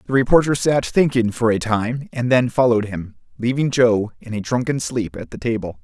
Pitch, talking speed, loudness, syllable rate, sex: 120 Hz, 205 wpm, -19 LUFS, 5.2 syllables/s, male